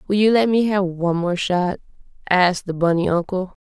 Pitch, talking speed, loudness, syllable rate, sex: 185 Hz, 200 wpm, -19 LUFS, 5.4 syllables/s, female